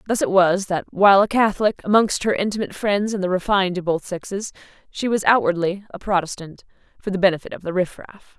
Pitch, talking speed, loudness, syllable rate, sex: 190 Hz, 200 wpm, -20 LUFS, 6.2 syllables/s, female